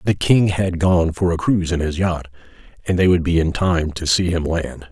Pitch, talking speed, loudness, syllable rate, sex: 85 Hz, 245 wpm, -18 LUFS, 5.1 syllables/s, male